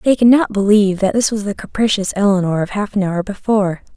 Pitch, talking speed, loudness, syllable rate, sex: 205 Hz, 225 wpm, -16 LUFS, 6.1 syllables/s, female